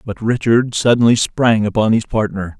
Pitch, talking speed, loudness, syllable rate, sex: 110 Hz, 160 wpm, -15 LUFS, 4.8 syllables/s, male